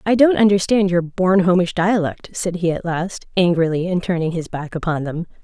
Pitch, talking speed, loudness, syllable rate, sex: 180 Hz, 190 wpm, -18 LUFS, 5.2 syllables/s, female